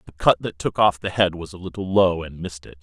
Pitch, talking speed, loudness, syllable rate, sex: 90 Hz, 295 wpm, -21 LUFS, 6.1 syllables/s, male